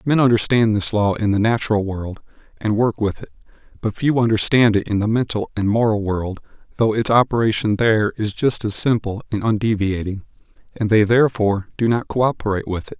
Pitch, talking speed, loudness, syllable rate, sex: 110 Hz, 185 wpm, -19 LUFS, 4.4 syllables/s, male